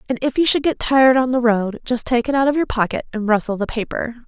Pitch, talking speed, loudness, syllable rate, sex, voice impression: 245 Hz, 280 wpm, -18 LUFS, 6.2 syllables/s, female, feminine, adult-like, slightly cute, slightly refreshing, slightly sincere, friendly